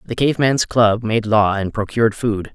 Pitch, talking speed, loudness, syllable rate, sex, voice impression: 115 Hz, 210 wpm, -17 LUFS, 4.5 syllables/s, male, masculine, very adult-like, fluent, slightly cool, slightly refreshing, slightly unique